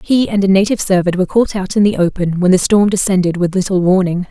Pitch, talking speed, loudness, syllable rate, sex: 190 Hz, 250 wpm, -14 LUFS, 6.4 syllables/s, female